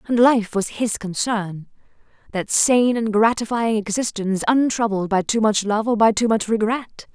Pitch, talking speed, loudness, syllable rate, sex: 220 Hz, 170 wpm, -20 LUFS, 4.6 syllables/s, female